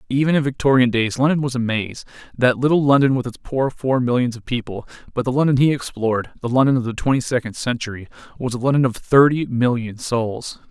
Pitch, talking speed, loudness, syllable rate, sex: 125 Hz, 205 wpm, -19 LUFS, 5.9 syllables/s, male